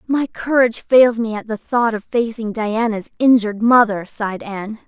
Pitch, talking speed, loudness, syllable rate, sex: 225 Hz, 170 wpm, -17 LUFS, 5.0 syllables/s, female